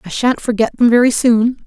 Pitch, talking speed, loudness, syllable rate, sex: 235 Hz, 215 wpm, -14 LUFS, 5.4 syllables/s, female